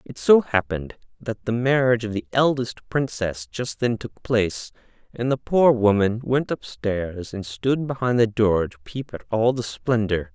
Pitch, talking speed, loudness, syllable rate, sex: 115 Hz, 180 wpm, -22 LUFS, 4.5 syllables/s, male